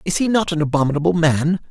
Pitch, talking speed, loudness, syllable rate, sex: 165 Hz, 210 wpm, -18 LUFS, 6.6 syllables/s, male